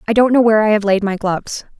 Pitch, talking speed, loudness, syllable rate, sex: 210 Hz, 300 wpm, -15 LUFS, 7.2 syllables/s, female